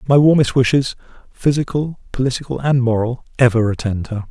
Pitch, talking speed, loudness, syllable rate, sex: 125 Hz, 110 wpm, -17 LUFS, 5.7 syllables/s, male